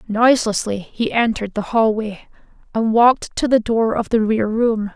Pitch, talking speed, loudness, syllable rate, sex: 225 Hz, 170 wpm, -18 LUFS, 4.8 syllables/s, female